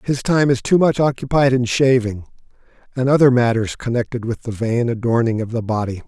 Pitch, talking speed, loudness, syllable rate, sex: 125 Hz, 190 wpm, -18 LUFS, 5.5 syllables/s, male